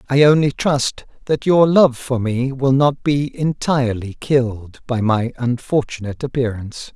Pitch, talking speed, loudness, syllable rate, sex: 130 Hz, 145 wpm, -18 LUFS, 4.5 syllables/s, male